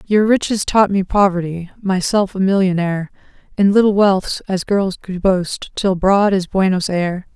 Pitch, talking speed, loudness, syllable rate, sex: 190 Hz, 165 wpm, -16 LUFS, 4.6 syllables/s, female